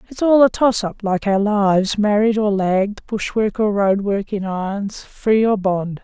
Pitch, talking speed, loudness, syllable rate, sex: 205 Hz, 180 wpm, -18 LUFS, 4.3 syllables/s, female